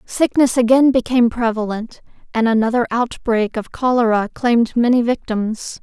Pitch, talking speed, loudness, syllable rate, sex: 235 Hz, 125 wpm, -17 LUFS, 4.9 syllables/s, female